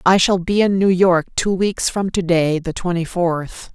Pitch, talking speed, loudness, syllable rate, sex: 180 Hz, 210 wpm, -18 LUFS, 4.2 syllables/s, female